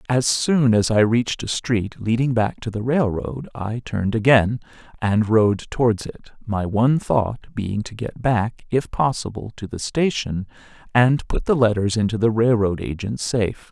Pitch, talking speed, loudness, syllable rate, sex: 115 Hz, 175 wpm, -21 LUFS, 4.5 syllables/s, male